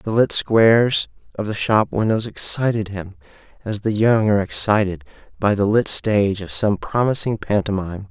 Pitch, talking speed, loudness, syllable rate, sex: 105 Hz, 165 wpm, -19 LUFS, 5.0 syllables/s, male